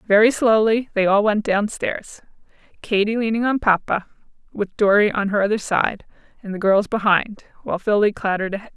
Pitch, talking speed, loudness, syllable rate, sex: 210 Hz, 170 wpm, -19 LUFS, 5.4 syllables/s, female